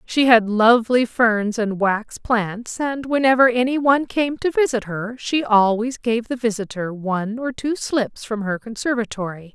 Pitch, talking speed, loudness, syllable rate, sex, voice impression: 235 Hz, 165 wpm, -20 LUFS, 4.4 syllables/s, female, feminine, very adult-like, slightly fluent, unique, slightly intense